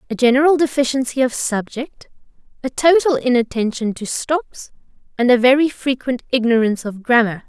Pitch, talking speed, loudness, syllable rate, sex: 255 Hz, 135 wpm, -17 LUFS, 5.3 syllables/s, female